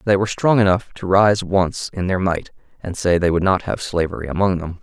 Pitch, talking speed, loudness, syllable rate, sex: 95 Hz, 235 wpm, -19 LUFS, 5.5 syllables/s, male